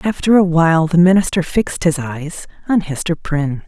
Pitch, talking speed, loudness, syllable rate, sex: 170 Hz, 165 wpm, -15 LUFS, 5.4 syllables/s, female